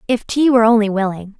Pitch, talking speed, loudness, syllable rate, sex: 220 Hz, 215 wpm, -15 LUFS, 6.5 syllables/s, female